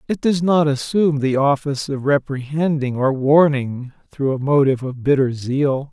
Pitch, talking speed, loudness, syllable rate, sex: 140 Hz, 160 wpm, -18 LUFS, 4.8 syllables/s, male